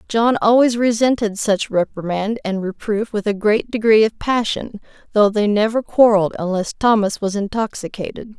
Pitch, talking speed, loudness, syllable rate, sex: 215 Hz, 150 wpm, -18 LUFS, 4.9 syllables/s, female